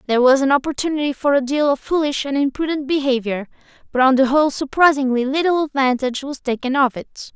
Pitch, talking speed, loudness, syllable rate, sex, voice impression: 275 Hz, 190 wpm, -18 LUFS, 6.2 syllables/s, female, very feminine, slightly adult-like, tensed, bright, slightly clear, refreshing, lively